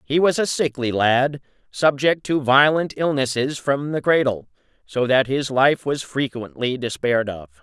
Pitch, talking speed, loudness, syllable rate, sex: 135 Hz, 155 wpm, -20 LUFS, 4.4 syllables/s, male